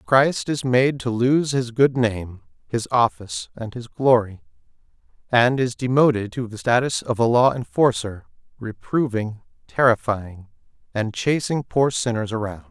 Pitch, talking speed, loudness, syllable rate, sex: 120 Hz, 140 wpm, -21 LUFS, 4.3 syllables/s, male